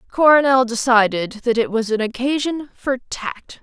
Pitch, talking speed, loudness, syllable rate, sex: 245 Hz, 150 wpm, -18 LUFS, 4.6 syllables/s, female